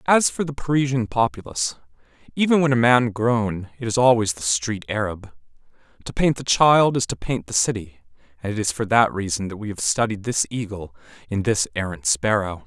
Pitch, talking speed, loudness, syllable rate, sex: 110 Hz, 195 wpm, -21 LUFS, 5.3 syllables/s, male